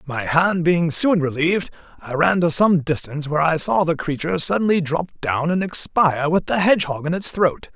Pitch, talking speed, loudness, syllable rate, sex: 165 Hz, 200 wpm, -19 LUFS, 5.4 syllables/s, male